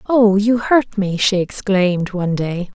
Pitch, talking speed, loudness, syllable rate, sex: 200 Hz, 150 wpm, -17 LUFS, 4.3 syllables/s, female